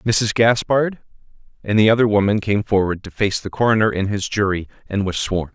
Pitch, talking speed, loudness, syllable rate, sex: 105 Hz, 195 wpm, -18 LUFS, 5.4 syllables/s, male